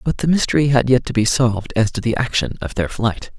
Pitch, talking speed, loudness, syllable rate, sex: 120 Hz, 265 wpm, -18 LUFS, 6.0 syllables/s, male